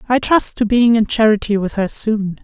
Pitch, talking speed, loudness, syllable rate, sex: 220 Hz, 220 wpm, -15 LUFS, 5.0 syllables/s, female